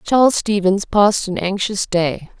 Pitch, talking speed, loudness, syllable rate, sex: 200 Hz, 150 wpm, -17 LUFS, 4.5 syllables/s, female